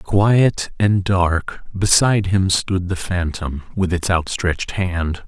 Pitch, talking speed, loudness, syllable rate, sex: 95 Hz, 135 wpm, -18 LUFS, 3.4 syllables/s, male